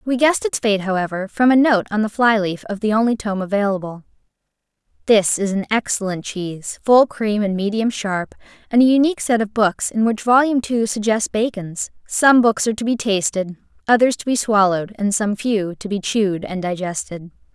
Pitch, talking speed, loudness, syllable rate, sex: 210 Hz, 190 wpm, -18 LUFS, 5.4 syllables/s, female